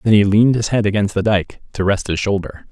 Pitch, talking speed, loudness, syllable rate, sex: 100 Hz, 265 wpm, -17 LUFS, 6.1 syllables/s, male